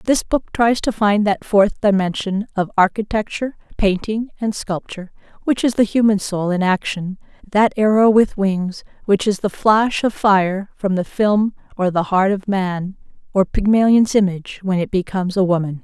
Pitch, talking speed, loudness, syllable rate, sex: 200 Hz, 175 wpm, -18 LUFS, 4.7 syllables/s, female